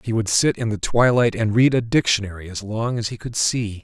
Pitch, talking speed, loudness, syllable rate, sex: 110 Hz, 250 wpm, -20 LUFS, 5.4 syllables/s, male